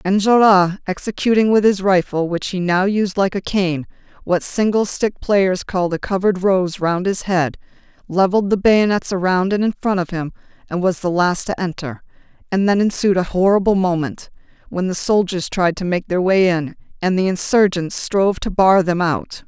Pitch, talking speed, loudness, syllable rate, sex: 190 Hz, 190 wpm, -17 LUFS, 4.9 syllables/s, female